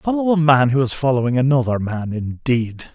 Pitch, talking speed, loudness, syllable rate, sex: 135 Hz, 185 wpm, -18 LUFS, 5.2 syllables/s, male